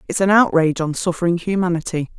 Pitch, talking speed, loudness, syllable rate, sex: 175 Hz, 165 wpm, -18 LUFS, 6.6 syllables/s, female